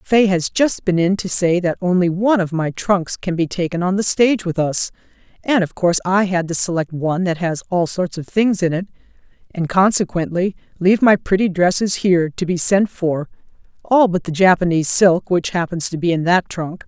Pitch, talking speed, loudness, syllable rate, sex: 180 Hz, 210 wpm, -17 LUFS, 5.3 syllables/s, female